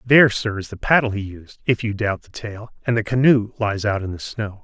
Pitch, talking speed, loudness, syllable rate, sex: 110 Hz, 260 wpm, -20 LUFS, 5.3 syllables/s, male